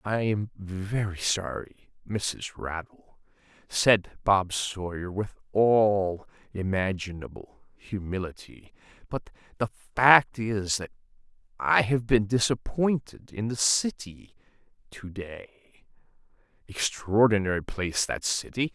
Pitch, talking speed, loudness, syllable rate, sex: 105 Hz, 95 wpm, -27 LUFS, 3.5 syllables/s, male